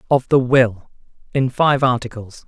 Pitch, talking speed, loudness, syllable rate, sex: 125 Hz, 145 wpm, -17 LUFS, 3.3 syllables/s, male